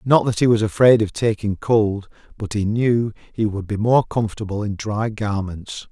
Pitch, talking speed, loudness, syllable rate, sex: 110 Hz, 195 wpm, -20 LUFS, 4.6 syllables/s, male